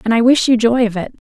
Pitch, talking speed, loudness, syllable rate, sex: 235 Hz, 330 wpm, -14 LUFS, 6.5 syllables/s, female